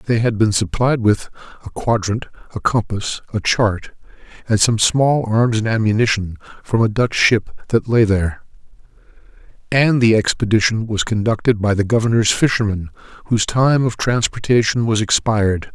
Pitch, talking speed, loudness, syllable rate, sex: 110 Hz, 150 wpm, -17 LUFS, 5.0 syllables/s, male